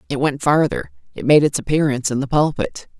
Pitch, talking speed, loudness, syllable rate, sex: 145 Hz, 200 wpm, -18 LUFS, 6.0 syllables/s, female